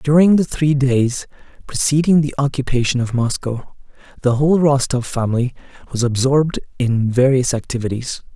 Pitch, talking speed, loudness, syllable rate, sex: 130 Hz, 130 wpm, -17 LUFS, 5.1 syllables/s, male